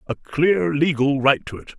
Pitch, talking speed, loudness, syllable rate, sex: 150 Hz, 200 wpm, -19 LUFS, 4.3 syllables/s, male